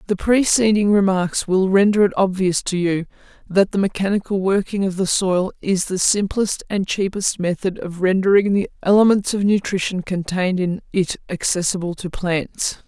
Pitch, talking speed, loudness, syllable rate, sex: 190 Hz, 160 wpm, -19 LUFS, 4.9 syllables/s, female